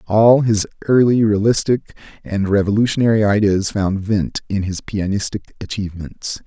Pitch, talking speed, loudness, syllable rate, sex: 105 Hz, 120 wpm, -17 LUFS, 4.7 syllables/s, male